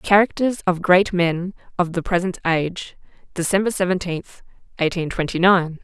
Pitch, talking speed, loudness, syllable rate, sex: 180 Hz, 135 wpm, -20 LUFS, 4.8 syllables/s, female